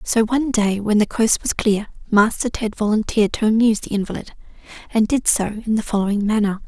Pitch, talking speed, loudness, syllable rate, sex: 215 Hz, 200 wpm, -19 LUFS, 5.9 syllables/s, female